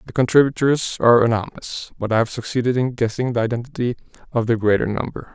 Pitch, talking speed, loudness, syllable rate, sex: 120 Hz, 180 wpm, -20 LUFS, 6.5 syllables/s, male